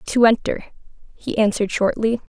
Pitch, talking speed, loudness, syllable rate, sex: 220 Hz, 125 wpm, -20 LUFS, 5.6 syllables/s, female